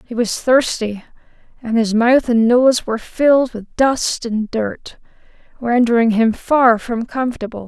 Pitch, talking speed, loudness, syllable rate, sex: 235 Hz, 150 wpm, -16 LUFS, 4.3 syllables/s, female